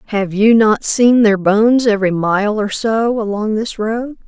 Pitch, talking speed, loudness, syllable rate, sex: 215 Hz, 180 wpm, -14 LUFS, 4.3 syllables/s, female